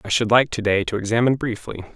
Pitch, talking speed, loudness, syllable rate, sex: 115 Hz, 245 wpm, -20 LUFS, 6.8 syllables/s, male